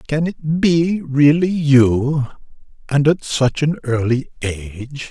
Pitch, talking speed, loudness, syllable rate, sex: 145 Hz, 130 wpm, -17 LUFS, 3.4 syllables/s, male